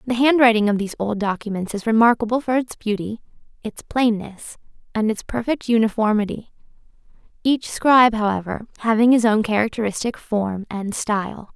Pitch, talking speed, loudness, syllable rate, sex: 220 Hz, 140 wpm, -20 LUFS, 5.4 syllables/s, female